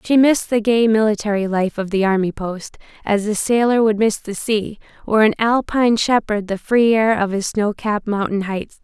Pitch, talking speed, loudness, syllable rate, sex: 215 Hz, 205 wpm, -18 LUFS, 5.0 syllables/s, female